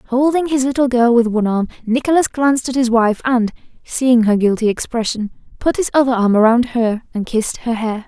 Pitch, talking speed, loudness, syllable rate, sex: 240 Hz, 200 wpm, -16 LUFS, 5.4 syllables/s, female